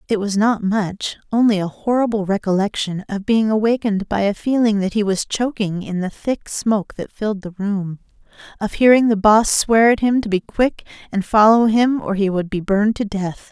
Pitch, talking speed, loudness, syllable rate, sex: 210 Hz, 205 wpm, -18 LUFS, 5.1 syllables/s, female